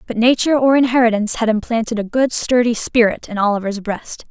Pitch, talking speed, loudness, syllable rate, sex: 230 Hz, 180 wpm, -16 LUFS, 6.1 syllables/s, female